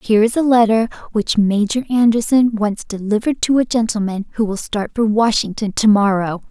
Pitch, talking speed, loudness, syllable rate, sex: 220 Hz, 175 wpm, -16 LUFS, 5.4 syllables/s, female